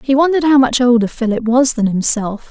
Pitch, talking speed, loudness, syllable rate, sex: 245 Hz, 215 wpm, -14 LUFS, 5.8 syllables/s, female